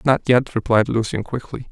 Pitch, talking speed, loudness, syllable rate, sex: 120 Hz, 175 wpm, -19 LUFS, 5.2 syllables/s, male